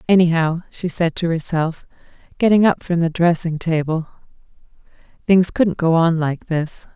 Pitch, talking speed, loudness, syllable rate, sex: 170 Hz, 145 wpm, -18 LUFS, 4.6 syllables/s, female